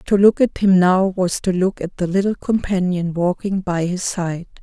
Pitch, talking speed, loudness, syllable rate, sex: 185 Hz, 205 wpm, -18 LUFS, 4.6 syllables/s, female